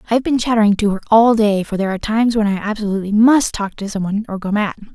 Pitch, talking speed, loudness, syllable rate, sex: 210 Hz, 265 wpm, -16 LUFS, 7.5 syllables/s, female